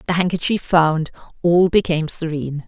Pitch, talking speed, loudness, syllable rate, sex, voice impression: 165 Hz, 135 wpm, -18 LUFS, 5.5 syllables/s, female, slightly masculine, feminine, very gender-neutral, adult-like, middle-aged, slightly thin, tensed, slightly powerful, bright, hard, clear, fluent, cool, intellectual, refreshing, very sincere, slightly calm, slightly friendly, slightly reassuring, very unique, slightly elegant, wild, very lively, strict, intense, sharp